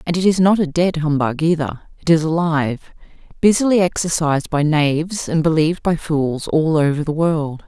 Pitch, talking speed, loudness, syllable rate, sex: 160 Hz, 180 wpm, -17 LUFS, 5.2 syllables/s, female